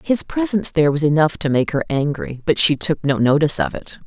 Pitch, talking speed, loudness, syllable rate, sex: 160 Hz, 235 wpm, -18 LUFS, 6.0 syllables/s, female